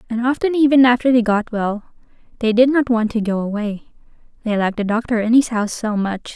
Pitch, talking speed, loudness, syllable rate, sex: 230 Hz, 210 wpm, -17 LUFS, 6.0 syllables/s, female